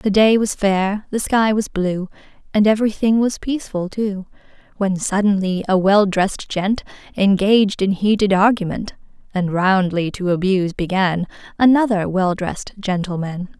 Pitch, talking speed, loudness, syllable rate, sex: 195 Hz, 140 wpm, -18 LUFS, 4.7 syllables/s, female